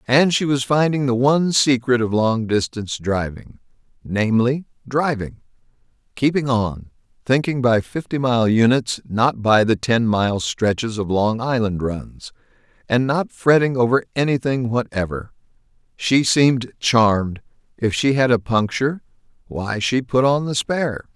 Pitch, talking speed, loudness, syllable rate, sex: 125 Hz, 135 wpm, -19 LUFS, 4.5 syllables/s, male